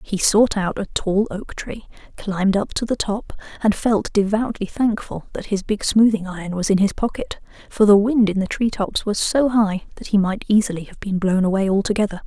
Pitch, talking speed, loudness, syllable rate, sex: 205 Hz, 215 wpm, -20 LUFS, 5.2 syllables/s, female